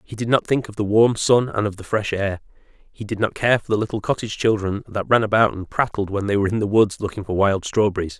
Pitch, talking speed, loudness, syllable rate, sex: 105 Hz, 270 wpm, -20 LUFS, 6.1 syllables/s, male